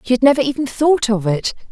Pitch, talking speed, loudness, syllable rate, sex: 250 Hz, 245 wpm, -16 LUFS, 6.1 syllables/s, female